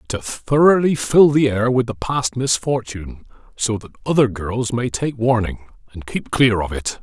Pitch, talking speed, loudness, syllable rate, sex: 120 Hz, 180 wpm, -18 LUFS, 4.7 syllables/s, male